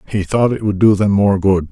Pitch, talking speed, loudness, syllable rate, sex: 100 Hz, 280 wpm, -14 LUFS, 5.4 syllables/s, male